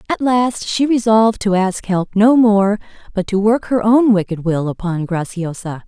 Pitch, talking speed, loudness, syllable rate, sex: 205 Hz, 185 wpm, -16 LUFS, 4.5 syllables/s, female